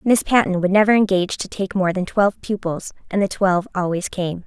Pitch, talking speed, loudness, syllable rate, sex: 190 Hz, 215 wpm, -19 LUFS, 5.8 syllables/s, female